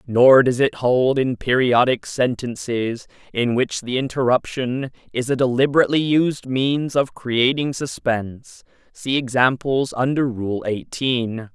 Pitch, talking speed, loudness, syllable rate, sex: 125 Hz, 125 wpm, -20 LUFS, 3.5 syllables/s, male